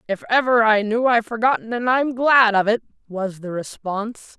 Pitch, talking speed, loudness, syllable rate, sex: 225 Hz, 190 wpm, -19 LUFS, 5.1 syllables/s, female